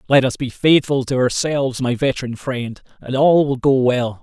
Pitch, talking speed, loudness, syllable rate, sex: 130 Hz, 200 wpm, -18 LUFS, 4.9 syllables/s, male